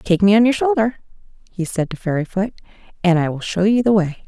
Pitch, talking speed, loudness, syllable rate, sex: 200 Hz, 225 wpm, -18 LUFS, 5.9 syllables/s, female